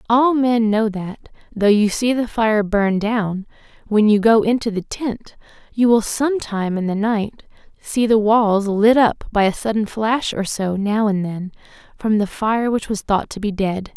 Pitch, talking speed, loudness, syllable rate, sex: 215 Hz, 200 wpm, -18 LUFS, 4.2 syllables/s, female